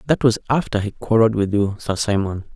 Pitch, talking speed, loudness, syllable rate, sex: 110 Hz, 210 wpm, -20 LUFS, 6.1 syllables/s, male